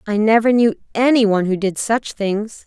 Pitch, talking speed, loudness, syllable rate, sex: 215 Hz, 205 wpm, -17 LUFS, 5.2 syllables/s, female